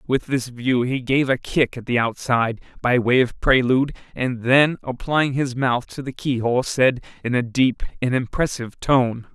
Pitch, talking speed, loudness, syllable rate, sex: 125 Hz, 185 wpm, -21 LUFS, 4.7 syllables/s, male